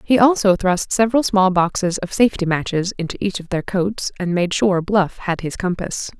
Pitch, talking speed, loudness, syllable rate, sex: 190 Hz, 205 wpm, -19 LUFS, 5.0 syllables/s, female